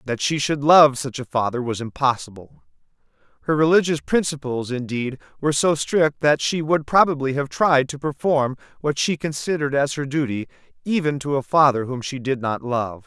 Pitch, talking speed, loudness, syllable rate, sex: 135 Hz, 180 wpm, -21 LUFS, 5.2 syllables/s, male